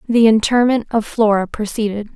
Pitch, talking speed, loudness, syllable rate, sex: 220 Hz, 140 wpm, -16 LUFS, 5.2 syllables/s, female